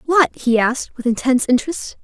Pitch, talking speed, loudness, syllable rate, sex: 265 Hz, 175 wpm, -18 LUFS, 6.2 syllables/s, female